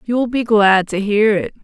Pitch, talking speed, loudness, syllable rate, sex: 210 Hz, 220 wpm, -15 LUFS, 4.1 syllables/s, female